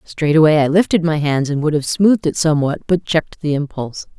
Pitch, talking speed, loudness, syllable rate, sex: 155 Hz, 215 wpm, -16 LUFS, 5.7 syllables/s, female